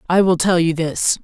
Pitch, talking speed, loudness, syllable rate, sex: 170 Hz, 245 wpm, -17 LUFS, 4.9 syllables/s, female